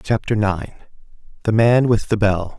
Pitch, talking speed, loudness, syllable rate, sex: 105 Hz, 140 wpm, -18 LUFS, 4.6 syllables/s, male